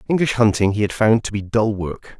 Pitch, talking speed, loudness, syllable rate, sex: 110 Hz, 245 wpm, -19 LUFS, 5.5 syllables/s, male